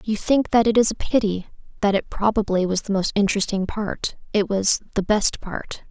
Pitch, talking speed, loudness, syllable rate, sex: 205 Hz, 205 wpm, -21 LUFS, 5.1 syllables/s, female